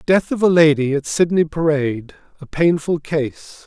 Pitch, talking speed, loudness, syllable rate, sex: 155 Hz, 165 wpm, -17 LUFS, 4.6 syllables/s, male